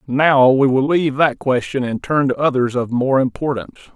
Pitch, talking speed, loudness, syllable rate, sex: 135 Hz, 195 wpm, -17 LUFS, 5.2 syllables/s, male